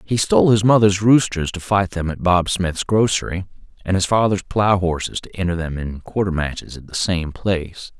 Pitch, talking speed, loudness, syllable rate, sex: 90 Hz, 205 wpm, -19 LUFS, 5.1 syllables/s, male